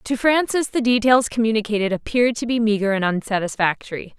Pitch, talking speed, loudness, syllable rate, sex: 225 Hz, 160 wpm, -20 LUFS, 6.0 syllables/s, female